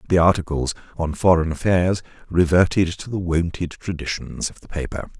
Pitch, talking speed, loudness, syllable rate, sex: 85 Hz, 150 wpm, -21 LUFS, 5.2 syllables/s, male